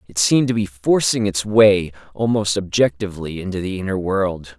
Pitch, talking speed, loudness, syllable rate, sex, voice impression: 100 Hz, 170 wpm, -19 LUFS, 5.2 syllables/s, male, masculine, adult-like, tensed, powerful, slightly dark, clear, slightly raspy, slightly nasal, cool, intellectual, calm, mature, wild, lively, slightly strict, slightly sharp